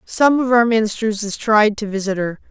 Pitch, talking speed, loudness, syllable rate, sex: 215 Hz, 215 wpm, -17 LUFS, 5.2 syllables/s, female